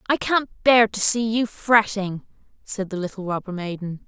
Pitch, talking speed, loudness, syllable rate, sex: 205 Hz, 175 wpm, -21 LUFS, 4.6 syllables/s, female